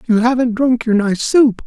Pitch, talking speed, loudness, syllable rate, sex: 235 Hz, 215 wpm, -14 LUFS, 4.7 syllables/s, male